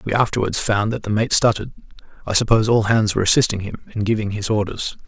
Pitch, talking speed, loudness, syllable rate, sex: 105 Hz, 215 wpm, -19 LUFS, 6.7 syllables/s, male